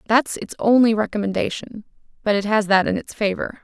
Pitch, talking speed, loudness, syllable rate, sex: 210 Hz, 180 wpm, -20 LUFS, 5.6 syllables/s, female